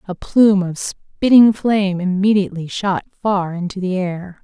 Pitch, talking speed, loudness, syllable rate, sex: 190 Hz, 150 wpm, -17 LUFS, 4.7 syllables/s, female